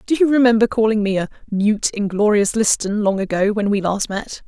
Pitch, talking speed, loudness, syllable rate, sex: 210 Hz, 200 wpm, -18 LUFS, 5.4 syllables/s, female